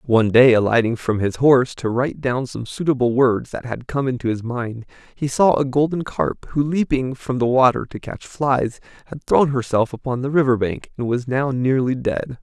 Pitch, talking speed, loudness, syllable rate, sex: 125 Hz, 210 wpm, -19 LUFS, 5.0 syllables/s, male